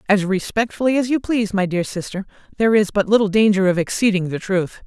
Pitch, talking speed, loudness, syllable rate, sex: 205 Hz, 210 wpm, -19 LUFS, 6.3 syllables/s, female